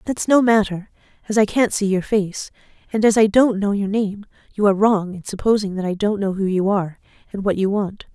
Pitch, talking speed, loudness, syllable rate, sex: 205 Hz, 235 wpm, -19 LUFS, 5.6 syllables/s, female